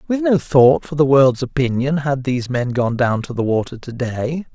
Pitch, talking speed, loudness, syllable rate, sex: 135 Hz, 225 wpm, -17 LUFS, 4.9 syllables/s, male